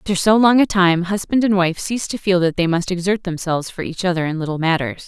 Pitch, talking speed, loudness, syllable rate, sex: 185 Hz, 260 wpm, -18 LUFS, 6.3 syllables/s, female